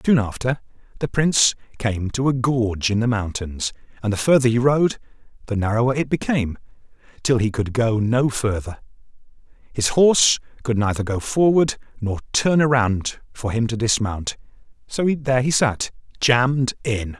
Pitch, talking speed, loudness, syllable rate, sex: 120 Hz, 155 wpm, -20 LUFS, 4.8 syllables/s, male